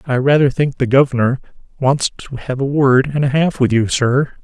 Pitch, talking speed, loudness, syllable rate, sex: 135 Hz, 215 wpm, -15 LUFS, 4.7 syllables/s, male